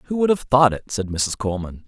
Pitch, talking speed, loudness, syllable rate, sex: 120 Hz, 255 wpm, -20 LUFS, 5.7 syllables/s, male